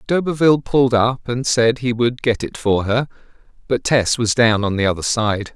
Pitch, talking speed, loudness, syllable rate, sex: 120 Hz, 205 wpm, -17 LUFS, 5.0 syllables/s, male